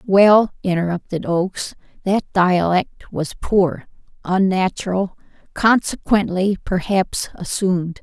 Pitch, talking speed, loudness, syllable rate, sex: 190 Hz, 75 wpm, -19 LUFS, 3.8 syllables/s, female